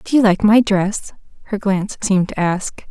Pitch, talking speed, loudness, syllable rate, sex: 200 Hz, 205 wpm, -17 LUFS, 5.1 syllables/s, female